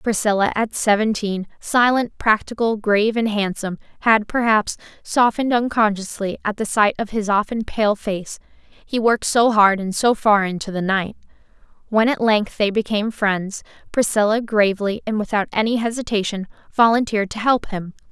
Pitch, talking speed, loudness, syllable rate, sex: 215 Hz, 150 wpm, -19 LUFS, 5.1 syllables/s, female